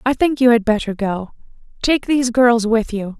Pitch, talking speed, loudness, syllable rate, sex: 235 Hz, 205 wpm, -17 LUFS, 5.0 syllables/s, female